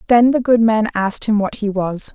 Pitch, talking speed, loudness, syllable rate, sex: 215 Hz, 250 wpm, -16 LUFS, 5.4 syllables/s, female